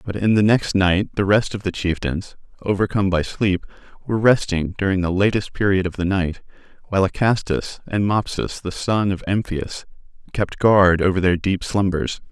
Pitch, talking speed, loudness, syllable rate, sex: 95 Hz, 175 wpm, -20 LUFS, 5.0 syllables/s, male